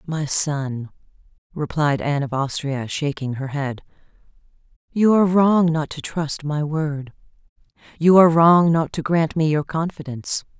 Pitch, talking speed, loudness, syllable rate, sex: 150 Hz, 145 wpm, -20 LUFS, 4.5 syllables/s, female